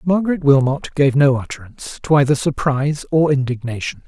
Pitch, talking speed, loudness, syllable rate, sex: 140 Hz, 145 wpm, -17 LUFS, 5.6 syllables/s, male